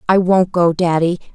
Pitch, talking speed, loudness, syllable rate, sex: 175 Hz, 180 wpm, -15 LUFS, 4.7 syllables/s, female